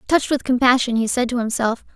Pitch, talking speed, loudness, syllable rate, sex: 245 Hz, 215 wpm, -19 LUFS, 6.4 syllables/s, female